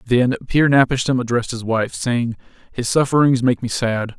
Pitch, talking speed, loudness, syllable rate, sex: 125 Hz, 200 wpm, -18 LUFS, 5.6 syllables/s, male